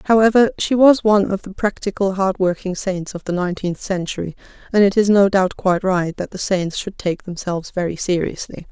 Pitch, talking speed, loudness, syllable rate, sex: 190 Hz, 195 wpm, -18 LUFS, 5.6 syllables/s, female